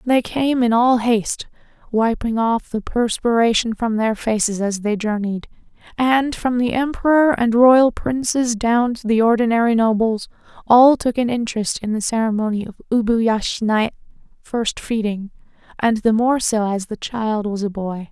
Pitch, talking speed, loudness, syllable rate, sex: 230 Hz, 160 wpm, -18 LUFS, 4.6 syllables/s, female